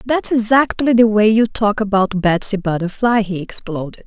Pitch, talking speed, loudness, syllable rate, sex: 215 Hz, 160 wpm, -16 LUFS, 4.9 syllables/s, female